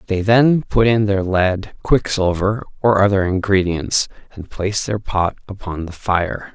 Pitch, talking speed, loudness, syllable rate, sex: 100 Hz, 155 wpm, -18 LUFS, 4.2 syllables/s, male